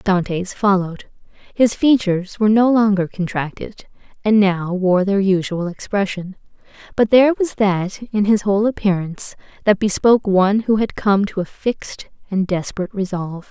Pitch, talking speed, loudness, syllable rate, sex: 200 Hz, 150 wpm, -18 LUFS, 5.2 syllables/s, female